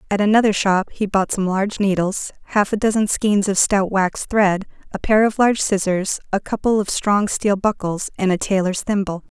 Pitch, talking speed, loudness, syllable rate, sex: 200 Hz, 200 wpm, -19 LUFS, 5.1 syllables/s, female